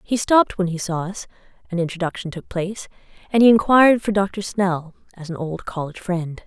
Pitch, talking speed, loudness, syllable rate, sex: 185 Hz, 195 wpm, -20 LUFS, 5.7 syllables/s, female